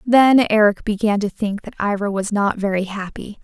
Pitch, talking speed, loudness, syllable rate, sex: 210 Hz, 190 wpm, -18 LUFS, 4.9 syllables/s, female